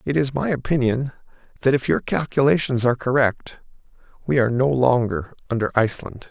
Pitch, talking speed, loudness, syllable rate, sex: 130 Hz, 150 wpm, -21 LUFS, 5.8 syllables/s, male